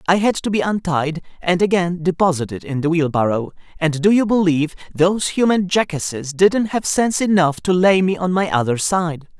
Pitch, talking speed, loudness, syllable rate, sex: 175 Hz, 185 wpm, -18 LUFS, 5.3 syllables/s, male